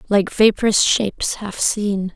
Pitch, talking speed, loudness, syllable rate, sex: 205 Hz, 140 wpm, -18 LUFS, 4.1 syllables/s, female